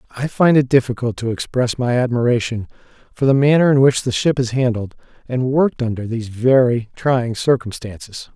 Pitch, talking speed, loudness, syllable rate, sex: 125 Hz, 170 wpm, -17 LUFS, 5.5 syllables/s, male